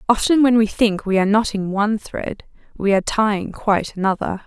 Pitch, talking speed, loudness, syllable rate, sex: 210 Hz, 190 wpm, -19 LUFS, 5.8 syllables/s, female